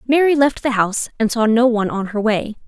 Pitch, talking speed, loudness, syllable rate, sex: 235 Hz, 245 wpm, -17 LUFS, 6.0 syllables/s, female